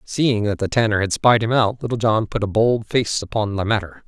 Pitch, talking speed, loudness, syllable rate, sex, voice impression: 110 Hz, 250 wpm, -19 LUFS, 5.3 syllables/s, male, masculine, adult-like, powerful, bright, hard, raspy, cool, mature, friendly, wild, lively, strict, intense, slightly sharp